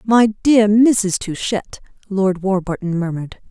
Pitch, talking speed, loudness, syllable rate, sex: 200 Hz, 120 wpm, -17 LUFS, 3.9 syllables/s, female